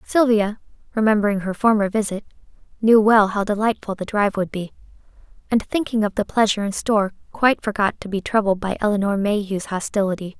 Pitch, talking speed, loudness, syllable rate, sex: 210 Hz, 165 wpm, -20 LUFS, 6.1 syllables/s, female